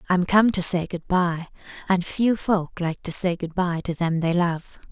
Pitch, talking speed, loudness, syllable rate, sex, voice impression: 180 Hz, 220 wpm, -22 LUFS, 4.3 syllables/s, female, feminine, adult-like, relaxed, weak, soft, raspy, intellectual, calm, reassuring, elegant, kind, modest